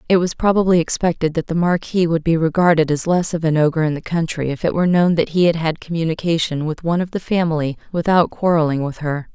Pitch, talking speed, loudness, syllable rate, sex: 165 Hz, 230 wpm, -18 LUFS, 6.2 syllables/s, female